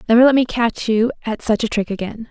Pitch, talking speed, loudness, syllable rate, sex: 230 Hz, 260 wpm, -18 LUFS, 6.0 syllables/s, female